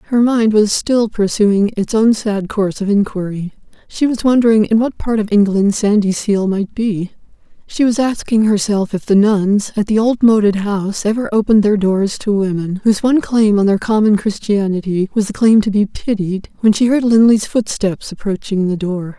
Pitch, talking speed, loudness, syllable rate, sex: 210 Hz, 190 wpm, -15 LUFS, 5.0 syllables/s, female